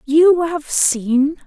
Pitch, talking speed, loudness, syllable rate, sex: 295 Hz, 125 wpm, -16 LUFS, 2.4 syllables/s, female